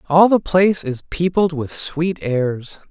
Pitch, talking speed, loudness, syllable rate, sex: 160 Hz, 165 wpm, -18 LUFS, 3.9 syllables/s, male